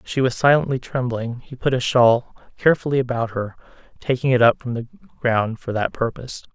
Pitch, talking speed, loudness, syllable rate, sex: 125 Hz, 195 wpm, -20 LUFS, 5.7 syllables/s, male